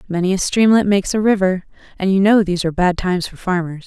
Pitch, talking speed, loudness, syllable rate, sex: 190 Hz, 235 wpm, -17 LUFS, 6.7 syllables/s, female